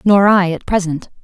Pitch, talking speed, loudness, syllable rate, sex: 185 Hz, 195 wpm, -14 LUFS, 4.8 syllables/s, female